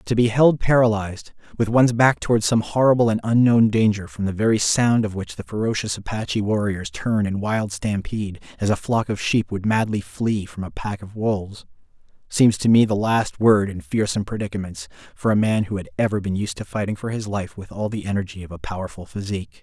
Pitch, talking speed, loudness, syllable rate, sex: 105 Hz, 215 wpm, -21 LUFS, 5.6 syllables/s, male